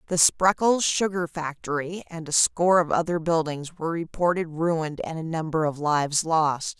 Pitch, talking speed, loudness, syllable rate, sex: 165 Hz, 170 wpm, -24 LUFS, 4.9 syllables/s, female